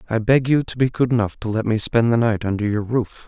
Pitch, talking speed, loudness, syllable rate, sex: 115 Hz, 295 wpm, -19 LUFS, 5.9 syllables/s, male